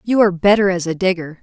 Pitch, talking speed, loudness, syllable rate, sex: 185 Hz, 255 wpm, -16 LUFS, 6.8 syllables/s, female